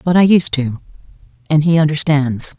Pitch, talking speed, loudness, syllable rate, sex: 150 Hz, 165 wpm, -14 LUFS, 5.0 syllables/s, female